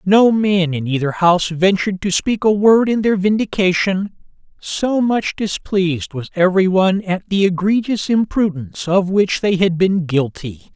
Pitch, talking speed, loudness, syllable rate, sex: 190 Hz, 160 wpm, -16 LUFS, 4.7 syllables/s, male